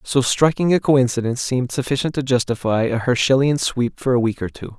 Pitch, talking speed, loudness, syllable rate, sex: 130 Hz, 200 wpm, -19 LUFS, 5.8 syllables/s, male